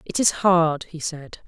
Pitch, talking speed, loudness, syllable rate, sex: 165 Hz, 205 wpm, -21 LUFS, 3.9 syllables/s, female